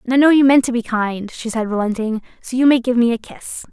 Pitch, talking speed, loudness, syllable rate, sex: 240 Hz, 290 wpm, -17 LUFS, 6.0 syllables/s, female